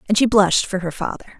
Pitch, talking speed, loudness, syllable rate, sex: 200 Hz, 260 wpm, -18 LUFS, 7.3 syllables/s, female